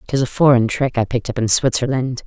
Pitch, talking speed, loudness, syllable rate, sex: 125 Hz, 240 wpm, -17 LUFS, 6.1 syllables/s, female